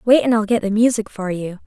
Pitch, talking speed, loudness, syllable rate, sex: 215 Hz, 290 wpm, -18 LUFS, 6.0 syllables/s, female